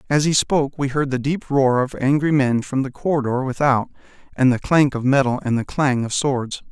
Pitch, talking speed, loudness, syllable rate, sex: 135 Hz, 225 wpm, -19 LUFS, 5.2 syllables/s, male